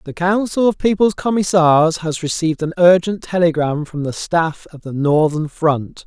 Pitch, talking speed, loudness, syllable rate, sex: 165 Hz, 170 wpm, -16 LUFS, 4.6 syllables/s, male